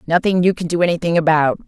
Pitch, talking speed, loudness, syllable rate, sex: 165 Hz, 215 wpm, -16 LUFS, 6.9 syllables/s, female